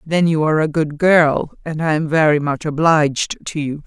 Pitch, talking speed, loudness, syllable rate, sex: 155 Hz, 215 wpm, -17 LUFS, 5.0 syllables/s, female